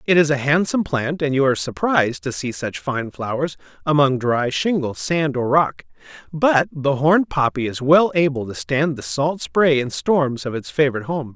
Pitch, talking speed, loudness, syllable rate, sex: 140 Hz, 200 wpm, -19 LUFS, 5.0 syllables/s, male